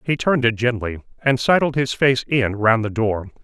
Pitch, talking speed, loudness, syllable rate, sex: 120 Hz, 210 wpm, -19 LUFS, 4.9 syllables/s, male